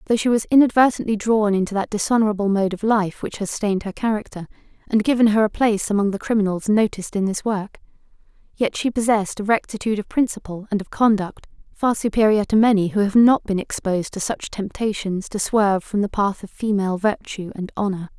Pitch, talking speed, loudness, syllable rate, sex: 205 Hz, 200 wpm, -20 LUFS, 6.0 syllables/s, female